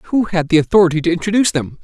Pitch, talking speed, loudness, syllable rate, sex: 175 Hz, 230 wpm, -15 LUFS, 7.3 syllables/s, male